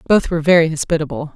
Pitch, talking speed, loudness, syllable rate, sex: 160 Hz, 180 wpm, -16 LUFS, 7.7 syllables/s, female